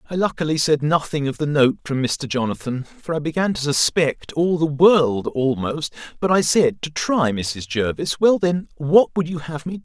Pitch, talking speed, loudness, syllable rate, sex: 155 Hz, 205 wpm, -20 LUFS, 4.8 syllables/s, male